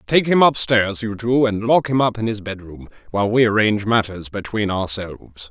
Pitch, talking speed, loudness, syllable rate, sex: 110 Hz, 195 wpm, -18 LUFS, 5.2 syllables/s, male